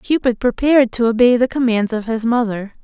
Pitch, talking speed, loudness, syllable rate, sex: 235 Hz, 190 wpm, -16 LUFS, 5.5 syllables/s, female